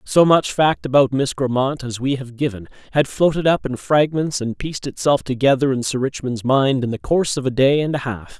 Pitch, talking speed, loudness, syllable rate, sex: 135 Hz, 230 wpm, -19 LUFS, 5.4 syllables/s, male